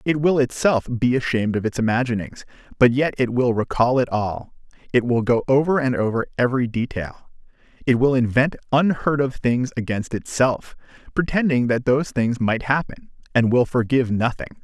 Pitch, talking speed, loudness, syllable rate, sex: 125 Hz, 170 wpm, -21 LUFS, 5.3 syllables/s, male